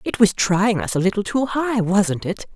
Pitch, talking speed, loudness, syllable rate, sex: 200 Hz, 235 wpm, -20 LUFS, 4.6 syllables/s, female